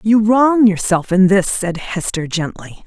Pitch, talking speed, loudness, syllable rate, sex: 195 Hz, 165 wpm, -15 LUFS, 4.0 syllables/s, female